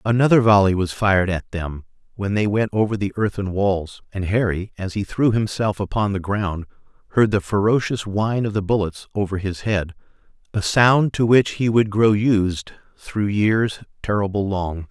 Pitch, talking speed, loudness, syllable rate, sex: 100 Hz, 175 wpm, -20 LUFS, 4.7 syllables/s, male